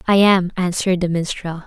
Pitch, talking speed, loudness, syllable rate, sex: 180 Hz, 180 wpm, -18 LUFS, 5.5 syllables/s, female